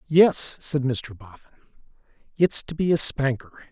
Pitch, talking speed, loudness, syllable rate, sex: 140 Hz, 145 wpm, -21 LUFS, 4.2 syllables/s, male